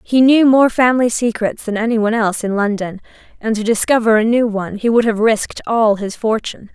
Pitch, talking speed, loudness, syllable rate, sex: 225 Hz, 215 wpm, -15 LUFS, 6.0 syllables/s, female